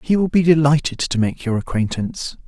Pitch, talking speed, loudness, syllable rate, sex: 140 Hz, 195 wpm, -18 LUFS, 5.7 syllables/s, male